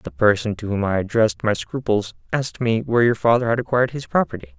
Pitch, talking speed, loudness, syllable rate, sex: 110 Hz, 220 wpm, -20 LUFS, 6.4 syllables/s, male